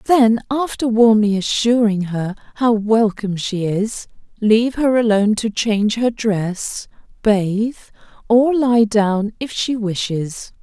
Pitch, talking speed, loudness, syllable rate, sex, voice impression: 220 Hz, 130 wpm, -17 LUFS, 3.9 syllables/s, female, feminine, adult-like, tensed, powerful, clear, intellectual, elegant, lively, slightly intense, slightly sharp